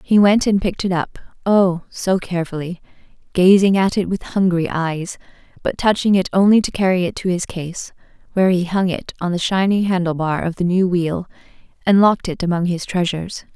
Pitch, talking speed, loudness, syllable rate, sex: 185 Hz, 190 wpm, -18 LUFS, 5.5 syllables/s, female